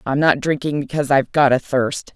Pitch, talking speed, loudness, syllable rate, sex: 145 Hz, 220 wpm, -18 LUFS, 5.9 syllables/s, female